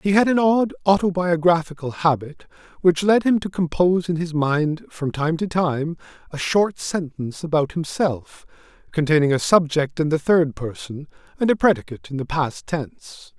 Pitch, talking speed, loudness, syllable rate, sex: 165 Hz, 165 wpm, -21 LUFS, 4.9 syllables/s, male